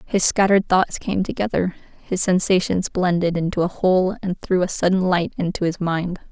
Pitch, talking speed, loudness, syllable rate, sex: 180 Hz, 180 wpm, -20 LUFS, 5.2 syllables/s, female